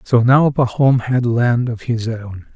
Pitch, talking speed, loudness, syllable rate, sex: 120 Hz, 190 wpm, -16 LUFS, 3.8 syllables/s, male